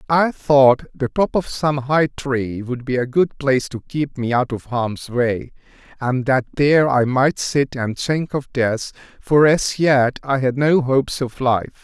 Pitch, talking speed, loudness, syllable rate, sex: 135 Hz, 200 wpm, -19 LUFS, 4.0 syllables/s, male